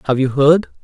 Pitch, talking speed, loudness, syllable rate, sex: 145 Hz, 215 wpm, -14 LUFS, 5.4 syllables/s, male